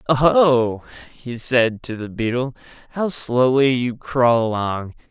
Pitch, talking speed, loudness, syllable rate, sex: 125 Hz, 140 wpm, -19 LUFS, 3.7 syllables/s, male